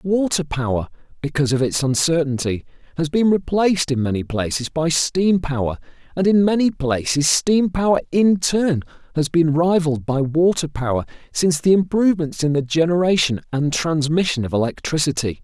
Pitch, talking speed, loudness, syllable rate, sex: 155 Hz, 150 wpm, -19 LUFS, 5.2 syllables/s, male